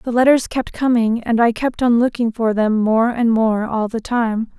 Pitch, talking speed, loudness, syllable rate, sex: 230 Hz, 225 wpm, -17 LUFS, 4.4 syllables/s, female